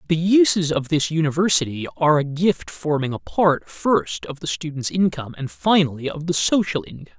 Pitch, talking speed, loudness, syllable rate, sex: 155 Hz, 185 wpm, -20 LUFS, 5.4 syllables/s, male